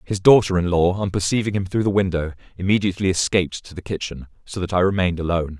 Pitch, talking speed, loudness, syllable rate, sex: 95 Hz, 215 wpm, -20 LUFS, 6.9 syllables/s, male